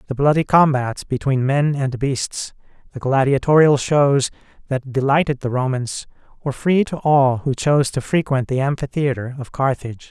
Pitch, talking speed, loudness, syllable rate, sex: 135 Hz, 155 wpm, -19 LUFS, 4.9 syllables/s, male